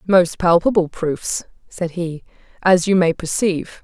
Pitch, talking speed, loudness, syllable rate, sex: 175 Hz, 140 wpm, -18 LUFS, 4.2 syllables/s, female